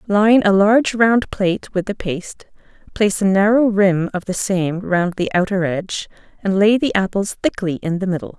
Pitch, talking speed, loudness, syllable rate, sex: 195 Hz, 195 wpm, -17 LUFS, 5.1 syllables/s, female